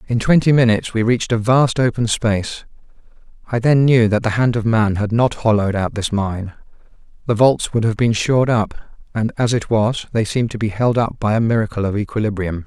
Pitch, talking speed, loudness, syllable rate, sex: 110 Hz, 215 wpm, -17 LUFS, 5.6 syllables/s, male